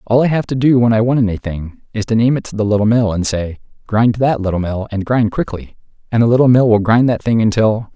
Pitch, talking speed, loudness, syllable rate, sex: 110 Hz, 265 wpm, -15 LUFS, 5.9 syllables/s, male